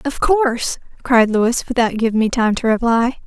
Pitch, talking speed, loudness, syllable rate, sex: 240 Hz, 185 wpm, -17 LUFS, 4.9 syllables/s, female